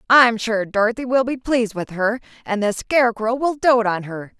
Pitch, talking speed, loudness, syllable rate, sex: 225 Hz, 205 wpm, -19 LUFS, 5.1 syllables/s, female